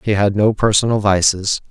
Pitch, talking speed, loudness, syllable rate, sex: 105 Hz, 175 wpm, -15 LUFS, 5.2 syllables/s, male